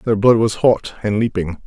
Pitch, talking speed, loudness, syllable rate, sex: 110 Hz, 215 wpm, -17 LUFS, 4.4 syllables/s, male